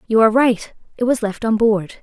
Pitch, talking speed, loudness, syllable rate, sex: 225 Hz, 235 wpm, -17 LUFS, 5.7 syllables/s, female